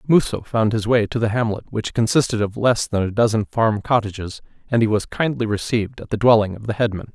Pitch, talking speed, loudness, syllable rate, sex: 110 Hz, 225 wpm, -20 LUFS, 5.9 syllables/s, male